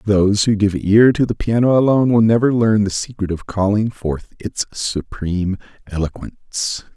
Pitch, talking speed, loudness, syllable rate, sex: 105 Hz, 165 wpm, -17 LUFS, 4.9 syllables/s, male